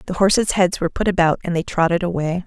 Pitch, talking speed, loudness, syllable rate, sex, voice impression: 175 Hz, 245 wpm, -19 LUFS, 6.6 syllables/s, female, very feminine, adult-like, slightly middle-aged, very thin, slightly relaxed, slightly weak, slightly dark, soft, clear, fluent, slightly raspy, slightly cute, cool, very intellectual, refreshing, very sincere, calm, friendly, reassuring, unique, elegant, slightly wild, sweet, slightly lively, slightly kind, slightly sharp, modest, light